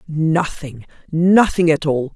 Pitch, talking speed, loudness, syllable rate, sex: 160 Hz, 110 wpm, -17 LUFS, 3.4 syllables/s, female